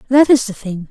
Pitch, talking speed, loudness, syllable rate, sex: 230 Hz, 265 wpm, -14 LUFS, 5.6 syllables/s, female